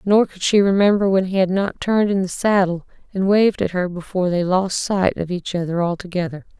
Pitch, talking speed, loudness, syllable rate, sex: 185 Hz, 220 wpm, -19 LUFS, 5.7 syllables/s, female